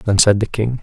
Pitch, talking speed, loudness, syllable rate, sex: 110 Hz, 290 wpm, -16 LUFS, 5.1 syllables/s, male